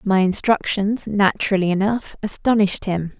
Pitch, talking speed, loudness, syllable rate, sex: 200 Hz, 115 wpm, -20 LUFS, 5.0 syllables/s, female